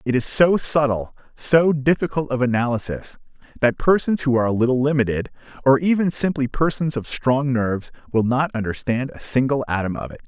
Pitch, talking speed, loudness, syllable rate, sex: 130 Hz, 175 wpm, -20 LUFS, 5.5 syllables/s, male